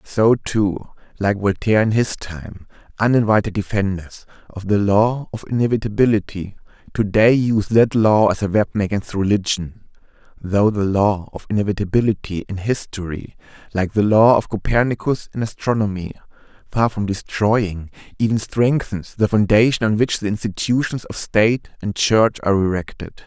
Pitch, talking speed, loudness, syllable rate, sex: 105 Hz, 140 wpm, -19 LUFS, 5.0 syllables/s, male